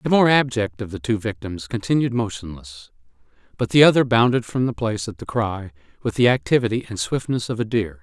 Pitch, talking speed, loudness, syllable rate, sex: 110 Hz, 200 wpm, -21 LUFS, 5.8 syllables/s, male